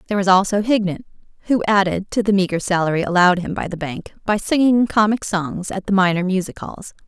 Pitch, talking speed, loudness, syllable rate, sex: 195 Hz, 205 wpm, -18 LUFS, 5.9 syllables/s, female